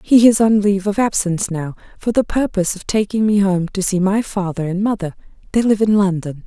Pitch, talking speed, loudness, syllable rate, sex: 200 Hz, 215 wpm, -17 LUFS, 5.7 syllables/s, female